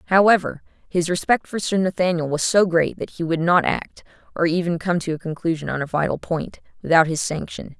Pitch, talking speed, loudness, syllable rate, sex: 170 Hz, 210 wpm, -21 LUFS, 5.6 syllables/s, female